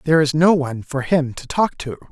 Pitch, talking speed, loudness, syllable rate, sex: 145 Hz, 255 wpm, -19 LUFS, 5.9 syllables/s, male